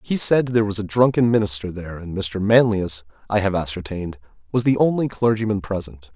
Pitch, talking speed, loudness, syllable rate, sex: 105 Hz, 185 wpm, -20 LUFS, 5.8 syllables/s, male